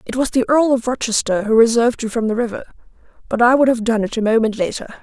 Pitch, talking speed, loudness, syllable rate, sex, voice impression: 235 Hz, 250 wpm, -17 LUFS, 6.7 syllables/s, female, feminine, middle-aged, slightly muffled, slightly unique, intense